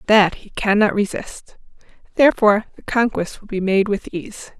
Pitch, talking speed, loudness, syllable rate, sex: 205 Hz, 155 wpm, -19 LUFS, 5.0 syllables/s, female